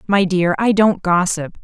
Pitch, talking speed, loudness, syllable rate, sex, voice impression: 185 Hz, 185 wpm, -16 LUFS, 4.2 syllables/s, female, very feminine, middle-aged, thin, tensed, slightly powerful, bright, slightly hard, very clear, very fluent, cool, intellectual, very refreshing, sincere, calm, friendly, reassuring, slightly unique, elegant, wild, slightly sweet, lively, slightly strict, intense, slightly sharp